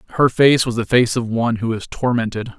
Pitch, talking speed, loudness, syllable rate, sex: 120 Hz, 230 wpm, -17 LUFS, 6.0 syllables/s, male